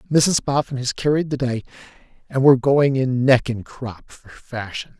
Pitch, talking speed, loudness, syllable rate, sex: 130 Hz, 180 wpm, -19 LUFS, 4.6 syllables/s, male